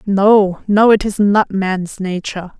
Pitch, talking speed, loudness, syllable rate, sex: 200 Hz, 160 wpm, -14 LUFS, 3.8 syllables/s, female